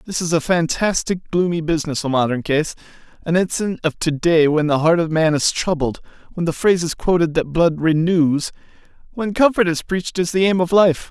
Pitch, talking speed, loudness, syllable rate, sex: 165 Hz, 205 wpm, -18 LUFS, 5.5 syllables/s, male